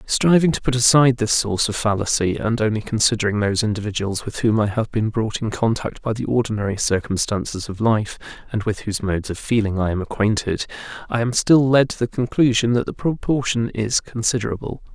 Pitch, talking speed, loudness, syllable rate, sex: 110 Hz, 195 wpm, -20 LUFS, 5.9 syllables/s, male